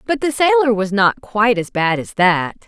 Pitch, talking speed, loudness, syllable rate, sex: 220 Hz, 225 wpm, -16 LUFS, 4.8 syllables/s, female